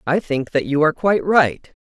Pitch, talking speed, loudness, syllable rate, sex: 160 Hz, 230 wpm, -18 LUFS, 5.5 syllables/s, female